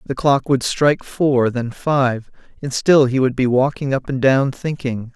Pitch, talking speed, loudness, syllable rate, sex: 130 Hz, 200 wpm, -18 LUFS, 4.3 syllables/s, male